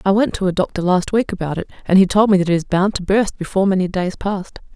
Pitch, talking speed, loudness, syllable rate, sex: 190 Hz, 290 wpm, -17 LUFS, 6.7 syllables/s, female